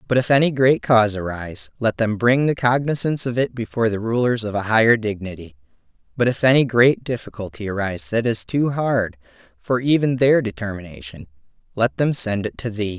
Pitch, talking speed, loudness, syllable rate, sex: 115 Hz, 185 wpm, -20 LUFS, 5.7 syllables/s, male